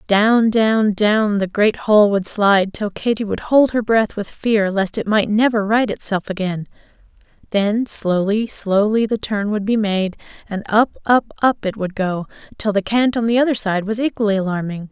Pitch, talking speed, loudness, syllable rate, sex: 210 Hz, 195 wpm, -18 LUFS, 4.6 syllables/s, female